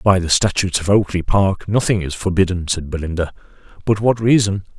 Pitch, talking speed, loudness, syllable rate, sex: 95 Hz, 175 wpm, -18 LUFS, 5.6 syllables/s, male